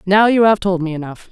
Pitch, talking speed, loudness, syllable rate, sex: 190 Hz, 275 wpm, -15 LUFS, 5.8 syllables/s, female